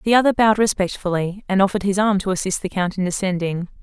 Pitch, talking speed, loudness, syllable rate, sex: 195 Hz, 220 wpm, -20 LUFS, 6.7 syllables/s, female